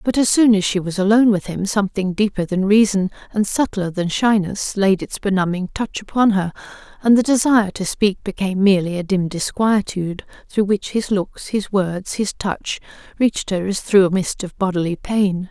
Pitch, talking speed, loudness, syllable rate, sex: 200 Hz, 195 wpm, -19 LUFS, 5.2 syllables/s, female